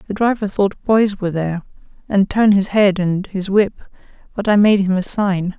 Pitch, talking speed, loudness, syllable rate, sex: 195 Hz, 205 wpm, -17 LUFS, 5.3 syllables/s, female